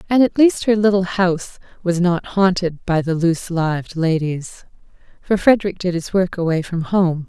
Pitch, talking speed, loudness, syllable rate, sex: 180 Hz, 180 wpm, -18 LUFS, 5.0 syllables/s, female